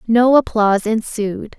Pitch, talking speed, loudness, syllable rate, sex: 225 Hz, 115 wpm, -16 LUFS, 4.1 syllables/s, female